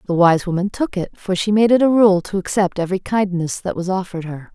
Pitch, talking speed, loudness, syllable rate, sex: 190 Hz, 250 wpm, -18 LUFS, 5.9 syllables/s, female